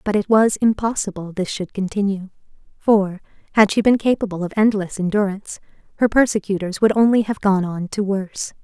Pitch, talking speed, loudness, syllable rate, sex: 200 Hz, 165 wpm, -19 LUFS, 5.6 syllables/s, female